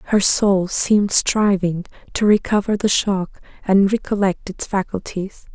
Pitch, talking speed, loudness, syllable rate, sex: 195 Hz, 130 wpm, -18 LUFS, 4.3 syllables/s, female